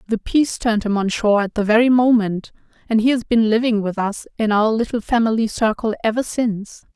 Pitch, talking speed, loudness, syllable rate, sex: 220 Hz, 205 wpm, -18 LUFS, 5.9 syllables/s, female